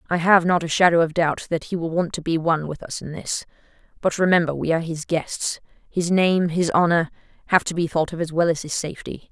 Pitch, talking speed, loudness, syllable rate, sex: 165 Hz, 245 wpm, -21 LUFS, 5.9 syllables/s, female